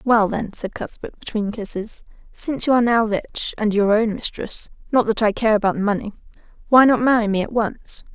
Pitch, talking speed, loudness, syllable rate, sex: 220 Hz, 190 wpm, -20 LUFS, 5.6 syllables/s, female